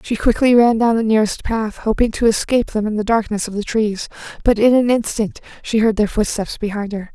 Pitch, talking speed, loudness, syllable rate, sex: 220 Hz, 225 wpm, -17 LUFS, 5.7 syllables/s, female